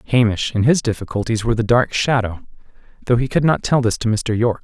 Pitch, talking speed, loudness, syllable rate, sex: 115 Hz, 220 wpm, -18 LUFS, 6.4 syllables/s, male